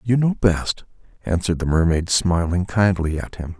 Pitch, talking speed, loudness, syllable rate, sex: 90 Hz, 165 wpm, -20 LUFS, 4.8 syllables/s, male